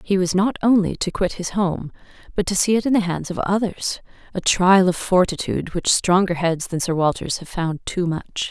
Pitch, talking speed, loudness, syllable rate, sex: 185 Hz, 220 wpm, -20 LUFS, 5.0 syllables/s, female